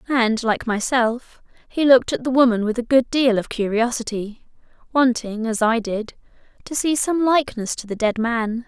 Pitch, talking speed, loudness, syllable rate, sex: 240 Hz, 165 wpm, -20 LUFS, 4.8 syllables/s, female